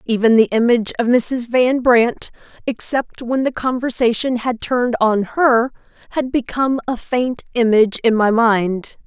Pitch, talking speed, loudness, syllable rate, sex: 240 Hz, 140 wpm, -17 LUFS, 4.5 syllables/s, female